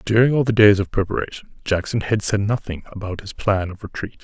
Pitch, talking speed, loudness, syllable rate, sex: 100 Hz, 215 wpm, -20 LUFS, 5.8 syllables/s, male